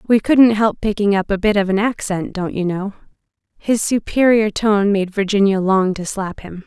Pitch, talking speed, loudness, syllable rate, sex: 205 Hz, 200 wpm, -17 LUFS, 4.8 syllables/s, female